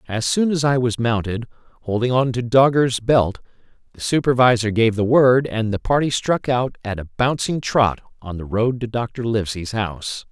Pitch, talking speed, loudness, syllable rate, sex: 120 Hz, 185 wpm, -19 LUFS, 4.9 syllables/s, male